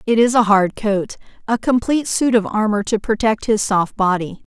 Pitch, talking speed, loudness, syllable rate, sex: 215 Hz, 200 wpm, -17 LUFS, 5.0 syllables/s, female